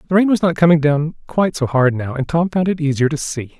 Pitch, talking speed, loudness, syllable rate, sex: 155 Hz, 285 wpm, -17 LUFS, 6.1 syllables/s, male